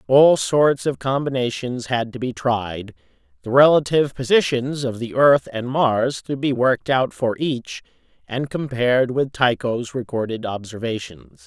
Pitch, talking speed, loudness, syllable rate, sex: 125 Hz, 145 wpm, -20 LUFS, 4.4 syllables/s, male